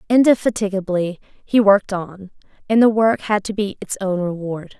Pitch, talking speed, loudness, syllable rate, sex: 200 Hz, 165 wpm, -18 LUFS, 4.9 syllables/s, female